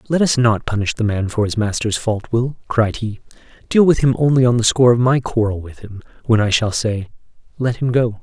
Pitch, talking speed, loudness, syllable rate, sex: 115 Hz, 225 wpm, -17 LUFS, 5.5 syllables/s, male